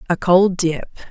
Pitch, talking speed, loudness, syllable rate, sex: 180 Hz, 165 wpm, -16 LUFS, 4.4 syllables/s, female